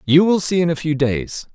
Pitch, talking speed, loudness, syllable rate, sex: 160 Hz, 270 wpm, -18 LUFS, 5.2 syllables/s, male